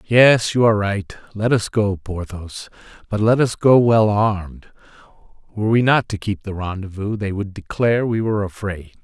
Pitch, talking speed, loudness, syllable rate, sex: 105 Hz, 180 wpm, -19 LUFS, 5.0 syllables/s, male